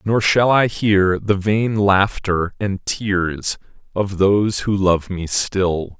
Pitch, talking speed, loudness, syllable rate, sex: 95 Hz, 150 wpm, -18 LUFS, 3.1 syllables/s, male